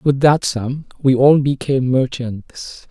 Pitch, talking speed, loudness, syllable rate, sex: 135 Hz, 145 wpm, -16 LUFS, 3.7 syllables/s, male